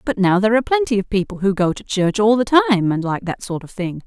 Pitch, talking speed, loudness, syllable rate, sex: 210 Hz, 295 wpm, -18 LUFS, 6.3 syllables/s, female